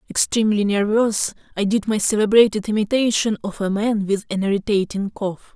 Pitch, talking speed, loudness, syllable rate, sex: 210 Hz, 150 wpm, -20 LUFS, 5.4 syllables/s, female